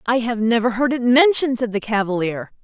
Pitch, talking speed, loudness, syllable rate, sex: 235 Hz, 205 wpm, -18 LUFS, 5.8 syllables/s, female